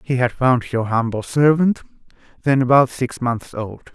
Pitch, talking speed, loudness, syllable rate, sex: 125 Hz, 165 wpm, -18 LUFS, 4.4 syllables/s, male